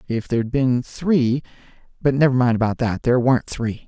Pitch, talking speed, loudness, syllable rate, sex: 125 Hz, 170 wpm, -20 LUFS, 5.1 syllables/s, male